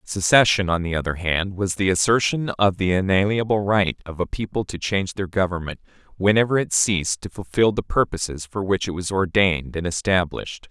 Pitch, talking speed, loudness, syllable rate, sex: 95 Hz, 185 wpm, -21 LUFS, 5.6 syllables/s, male